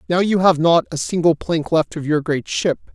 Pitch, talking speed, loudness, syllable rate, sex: 165 Hz, 245 wpm, -18 LUFS, 5.0 syllables/s, male